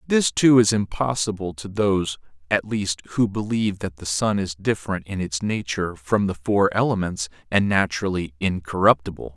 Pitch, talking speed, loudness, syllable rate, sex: 95 Hz, 160 wpm, -22 LUFS, 5.2 syllables/s, male